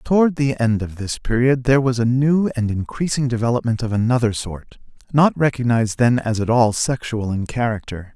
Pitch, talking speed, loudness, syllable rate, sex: 120 Hz, 185 wpm, -19 LUFS, 5.3 syllables/s, male